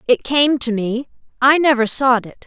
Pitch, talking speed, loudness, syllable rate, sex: 255 Hz, 170 wpm, -16 LUFS, 4.5 syllables/s, female